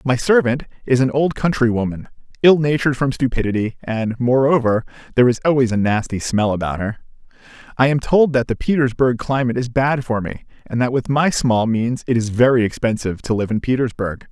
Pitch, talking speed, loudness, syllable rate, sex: 125 Hz, 195 wpm, -18 LUFS, 5.8 syllables/s, male